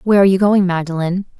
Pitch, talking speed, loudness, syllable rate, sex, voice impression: 185 Hz, 215 wpm, -15 LUFS, 7.6 syllables/s, female, feminine, adult-like, tensed, powerful, bright, clear, slightly fluent, intellectual, friendly, elegant, kind, modest